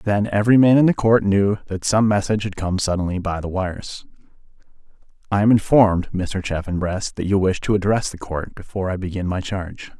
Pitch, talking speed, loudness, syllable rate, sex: 100 Hz, 200 wpm, -20 LUFS, 5.8 syllables/s, male